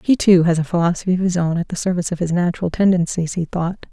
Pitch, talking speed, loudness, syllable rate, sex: 175 Hz, 260 wpm, -18 LUFS, 6.8 syllables/s, female